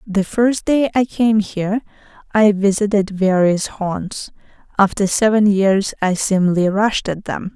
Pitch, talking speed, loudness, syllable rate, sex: 205 Hz, 145 wpm, -17 LUFS, 4.0 syllables/s, female